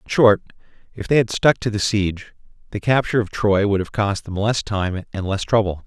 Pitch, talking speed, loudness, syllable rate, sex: 105 Hz, 225 wpm, -20 LUFS, 5.4 syllables/s, male